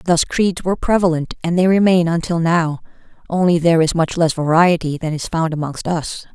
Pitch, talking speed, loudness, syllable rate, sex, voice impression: 170 Hz, 190 wpm, -17 LUFS, 5.3 syllables/s, female, feminine, adult-like, slightly middle-aged, thin, tensed, powerful, bright, slightly hard, clear, fluent, slightly cool, intellectual, refreshing, slightly sincere, calm, friendly, reassuring, slightly unique, elegant, kind, slightly modest